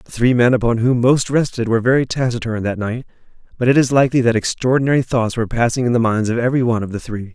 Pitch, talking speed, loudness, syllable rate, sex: 120 Hz, 245 wpm, -17 LUFS, 7.0 syllables/s, male